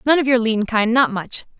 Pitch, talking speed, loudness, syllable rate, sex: 235 Hz, 265 wpm, -17 LUFS, 5.2 syllables/s, female